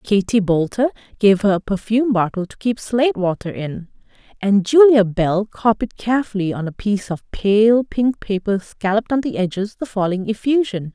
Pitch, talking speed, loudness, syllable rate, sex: 210 Hz, 170 wpm, -18 LUFS, 5.1 syllables/s, female